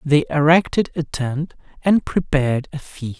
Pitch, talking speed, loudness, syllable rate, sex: 150 Hz, 150 wpm, -19 LUFS, 4.4 syllables/s, male